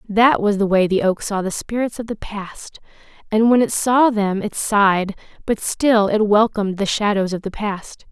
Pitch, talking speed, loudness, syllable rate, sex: 210 Hz, 205 wpm, -18 LUFS, 4.6 syllables/s, female